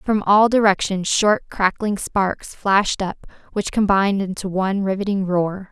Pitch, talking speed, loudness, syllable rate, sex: 195 Hz, 145 wpm, -19 LUFS, 4.4 syllables/s, female